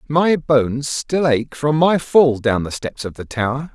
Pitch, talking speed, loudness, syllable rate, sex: 140 Hz, 210 wpm, -18 LUFS, 4.2 syllables/s, male